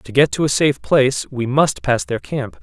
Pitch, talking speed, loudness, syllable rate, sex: 130 Hz, 250 wpm, -18 LUFS, 5.1 syllables/s, male